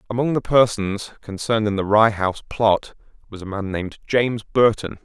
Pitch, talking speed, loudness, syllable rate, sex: 110 Hz, 180 wpm, -20 LUFS, 5.5 syllables/s, male